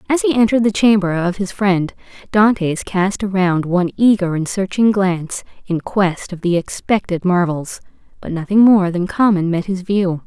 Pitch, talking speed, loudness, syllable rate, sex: 190 Hz, 175 wpm, -16 LUFS, 4.8 syllables/s, female